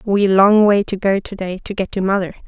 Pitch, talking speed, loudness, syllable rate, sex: 195 Hz, 265 wpm, -16 LUFS, 5.4 syllables/s, female